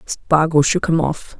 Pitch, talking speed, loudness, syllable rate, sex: 155 Hz, 170 wpm, -17 LUFS, 3.9 syllables/s, female